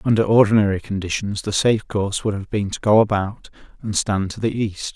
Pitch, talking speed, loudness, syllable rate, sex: 105 Hz, 205 wpm, -20 LUFS, 5.8 syllables/s, male